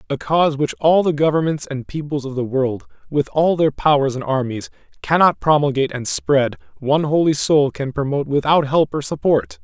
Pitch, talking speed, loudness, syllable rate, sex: 145 Hz, 185 wpm, -18 LUFS, 5.3 syllables/s, male